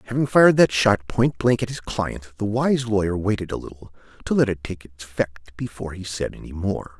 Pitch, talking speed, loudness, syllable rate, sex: 105 Hz, 215 wpm, -22 LUFS, 5.6 syllables/s, male